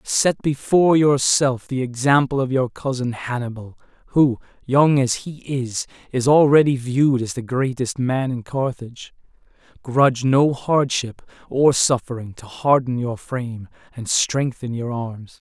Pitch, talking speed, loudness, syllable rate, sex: 130 Hz, 140 wpm, -20 LUFS, 4.3 syllables/s, male